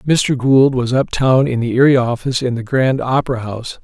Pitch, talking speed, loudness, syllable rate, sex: 125 Hz, 220 wpm, -15 LUFS, 5.4 syllables/s, male